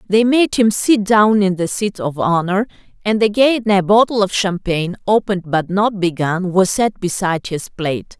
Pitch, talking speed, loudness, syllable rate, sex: 195 Hz, 185 wpm, -16 LUFS, 4.8 syllables/s, female